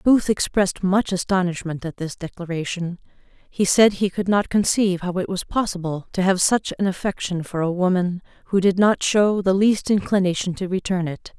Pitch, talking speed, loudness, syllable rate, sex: 190 Hz, 185 wpm, -21 LUFS, 5.0 syllables/s, female